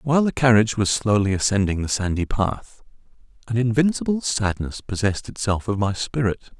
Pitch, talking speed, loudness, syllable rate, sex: 110 Hz, 155 wpm, -21 LUFS, 5.5 syllables/s, male